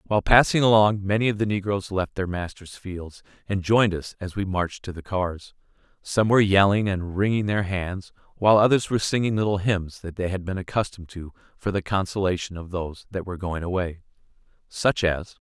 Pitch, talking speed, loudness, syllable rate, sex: 95 Hz, 195 wpm, -23 LUFS, 5.6 syllables/s, male